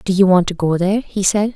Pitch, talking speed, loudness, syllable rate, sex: 190 Hz, 310 wpm, -16 LUFS, 6.2 syllables/s, female